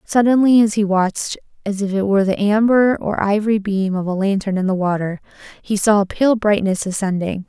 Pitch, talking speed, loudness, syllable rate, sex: 205 Hz, 200 wpm, -17 LUFS, 5.4 syllables/s, female